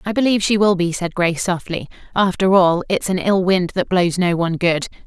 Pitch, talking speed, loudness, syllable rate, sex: 180 Hz, 225 wpm, -18 LUFS, 5.6 syllables/s, female